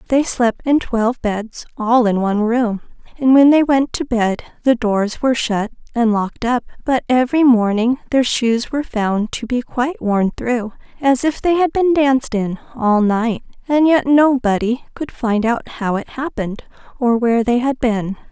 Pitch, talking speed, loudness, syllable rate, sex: 240 Hz, 185 wpm, -17 LUFS, 4.6 syllables/s, female